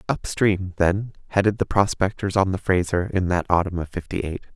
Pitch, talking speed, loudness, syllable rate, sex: 95 Hz, 200 wpm, -22 LUFS, 5.2 syllables/s, male